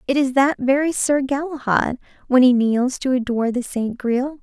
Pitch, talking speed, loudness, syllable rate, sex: 260 Hz, 190 wpm, -19 LUFS, 4.9 syllables/s, female